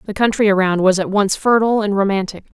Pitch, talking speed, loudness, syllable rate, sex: 200 Hz, 210 wpm, -16 LUFS, 6.3 syllables/s, female